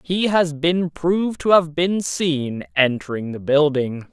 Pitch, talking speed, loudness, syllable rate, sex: 155 Hz, 160 wpm, -19 LUFS, 3.8 syllables/s, male